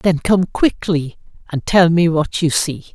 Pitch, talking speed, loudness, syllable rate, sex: 165 Hz, 185 wpm, -16 LUFS, 4.0 syllables/s, female